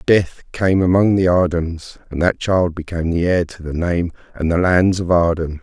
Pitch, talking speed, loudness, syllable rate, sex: 85 Hz, 205 wpm, -17 LUFS, 4.7 syllables/s, male